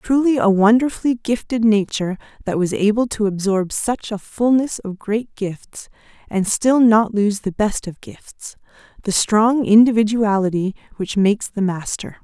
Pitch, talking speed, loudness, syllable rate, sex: 215 Hz, 145 wpm, -18 LUFS, 4.5 syllables/s, female